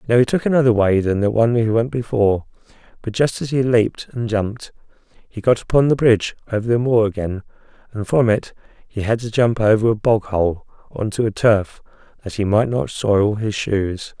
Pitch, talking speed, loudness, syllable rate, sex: 110 Hz, 205 wpm, -18 LUFS, 5.4 syllables/s, male